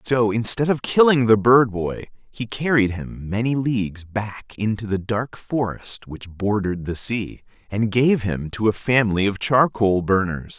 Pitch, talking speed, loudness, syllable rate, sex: 110 Hz, 170 wpm, -21 LUFS, 4.4 syllables/s, male